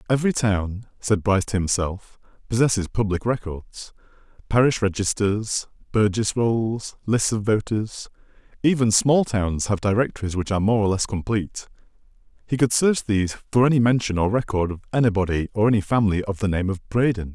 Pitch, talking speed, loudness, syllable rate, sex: 105 Hz, 150 wpm, -22 LUFS, 5.4 syllables/s, male